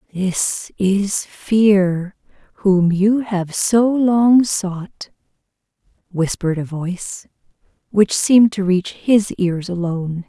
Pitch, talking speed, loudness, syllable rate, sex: 195 Hz, 110 wpm, -17 LUFS, 3.2 syllables/s, female